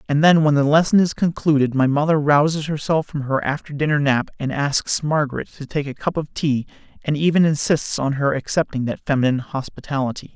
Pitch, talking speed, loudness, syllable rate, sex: 145 Hz, 195 wpm, -20 LUFS, 5.7 syllables/s, male